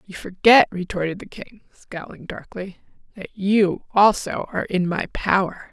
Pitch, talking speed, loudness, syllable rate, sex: 190 Hz, 145 wpm, -20 LUFS, 4.4 syllables/s, female